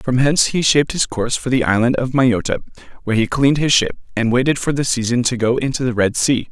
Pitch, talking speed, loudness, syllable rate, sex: 130 Hz, 250 wpm, -17 LUFS, 6.5 syllables/s, male